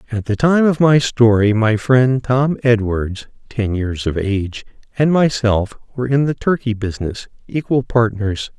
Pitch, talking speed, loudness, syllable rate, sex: 120 Hz, 160 wpm, -17 LUFS, 4.2 syllables/s, male